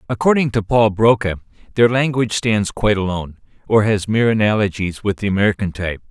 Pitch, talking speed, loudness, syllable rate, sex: 105 Hz, 165 wpm, -17 LUFS, 6.4 syllables/s, male